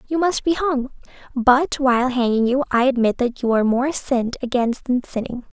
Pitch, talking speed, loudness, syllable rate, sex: 255 Hz, 195 wpm, -19 LUFS, 5.3 syllables/s, female